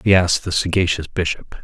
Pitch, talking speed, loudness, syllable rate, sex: 90 Hz, 185 wpm, -19 LUFS, 5.2 syllables/s, male